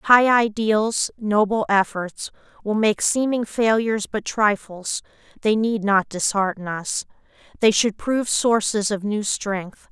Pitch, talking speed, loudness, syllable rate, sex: 210 Hz, 135 wpm, -21 LUFS, 3.9 syllables/s, female